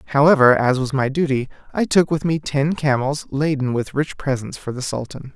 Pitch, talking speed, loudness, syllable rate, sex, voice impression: 140 Hz, 200 wpm, -19 LUFS, 5.2 syllables/s, male, masculine, slightly adult-like, slightly clear, refreshing, sincere, friendly